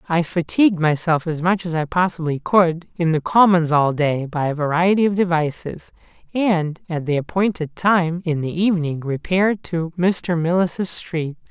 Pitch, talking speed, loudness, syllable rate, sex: 170 Hz, 165 wpm, -19 LUFS, 4.5 syllables/s, male